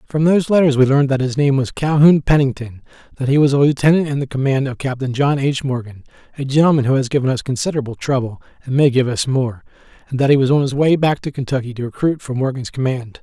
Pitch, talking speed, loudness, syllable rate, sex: 135 Hz, 235 wpm, -17 LUFS, 6.5 syllables/s, male